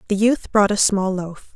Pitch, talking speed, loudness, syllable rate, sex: 200 Hz, 230 wpm, -18 LUFS, 4.5 syllables/s, female